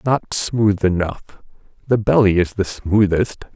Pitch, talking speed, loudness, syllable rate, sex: 100 Hz, 135 wpm, -18 LUFS, 3.8 syllables/s, male